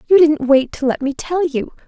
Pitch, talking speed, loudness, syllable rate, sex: 295 Hz, 255 wpm, -16 LUFS, 5.1 syllables/s, female